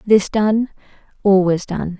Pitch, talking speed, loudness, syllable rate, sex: 200 Hz, 150 wpm, -17 LUFS, 3.7 syllables/s, female